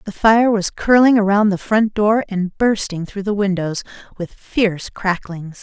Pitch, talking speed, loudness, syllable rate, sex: 200 Hz, 170 wpm, -17 LUFS, 4.3 syllables/s, female